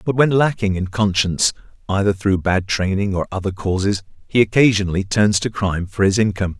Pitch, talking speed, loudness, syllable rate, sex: 100 Hz, 180 wpm, -18 LUFS, 5.8 syllables/s, male